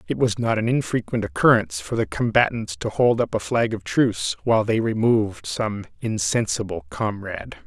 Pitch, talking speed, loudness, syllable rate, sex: 115 Hz, 170 wpm, -22 LUFS, 5.3 syllables/s, male